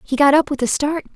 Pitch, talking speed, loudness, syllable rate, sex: 285 Hz, 315 wpm, -17 LUFS, 6.5 syllables/s, female